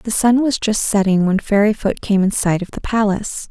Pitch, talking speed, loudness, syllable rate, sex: 205 Hz, 225 wpm, -17 LUFS, 5.2 syllables/s, female